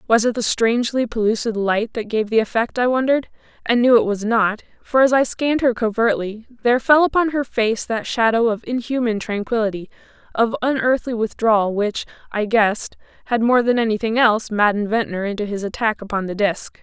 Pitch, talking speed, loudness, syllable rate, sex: 225 Hz, 185 wpm, -19 LUFS, 5.6 syllables/s, female